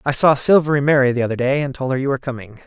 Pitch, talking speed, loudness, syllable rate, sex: 135 Hz, 290 wpm, -17 LUFS, 7.5 syllables/s, male